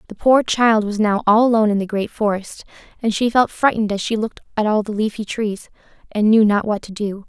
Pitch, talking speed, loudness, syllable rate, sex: 215 Hz, 240 wpm, -18 LUFS, 5.9 syllables/s, female